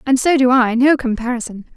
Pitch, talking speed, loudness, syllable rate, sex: 250 Hz, 205 wpm, -15 LUFS, 5.7 syllables/s, female